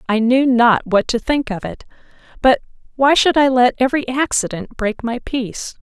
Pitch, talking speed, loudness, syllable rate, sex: 245 Hz, 175 wpm, -16 LUFS, 5.0 syllables/s, female